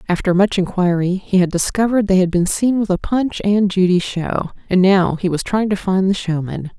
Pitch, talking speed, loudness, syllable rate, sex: 190 Hz, 220 wpm, -17 LUFS, 5.2 syllables/s, female